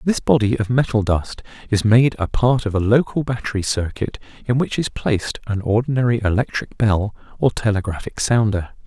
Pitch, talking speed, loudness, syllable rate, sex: 115 Hz, 170 wpm, -19 LUFS, 5.2 syllables/s, male